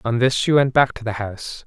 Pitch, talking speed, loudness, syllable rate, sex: 120 Hz, 290 wpm, -19 LUFS, 5.7 syllables/s, male